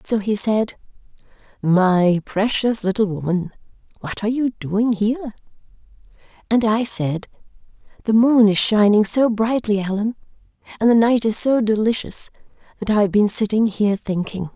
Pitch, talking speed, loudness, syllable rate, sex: 210 Hz, 145 wpm, -19 LUFS, 4.8 syllables/s, female